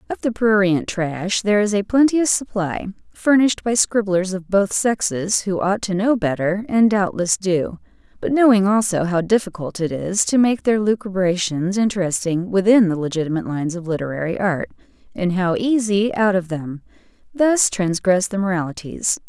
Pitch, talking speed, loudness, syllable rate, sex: 195 Hz, 160 wpm, -19 LUFS, 4.9 syllables/s, female